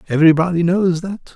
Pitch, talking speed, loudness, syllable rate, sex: 170 Hz, 135 wpm, -16 LUFS, 6.1 syllables/s, male